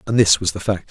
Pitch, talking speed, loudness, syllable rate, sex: 95 Hz, 330 wpm, -17 LUFS, 6.5 syllables/s, male